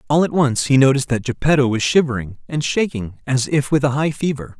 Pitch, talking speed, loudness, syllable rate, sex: 135 Hz, 220 wpm, -18 LUFS, 6.0 syllables/s, male